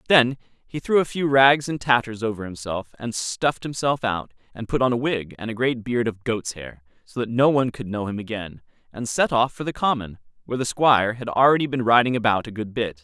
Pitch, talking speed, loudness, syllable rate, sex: 120 Hz, 235 wpm, -22 LUFS, 5.6 syllables/s, male